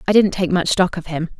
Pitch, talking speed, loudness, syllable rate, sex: 180 Hz, 300 wpm, -18 LUFS, 6.0 syllables/s, female